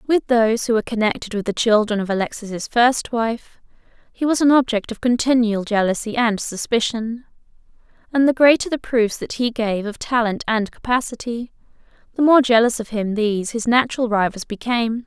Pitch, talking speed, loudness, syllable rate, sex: 230 Hz, 170 wpm, -19 LUFS, 5.4 syllables/s, female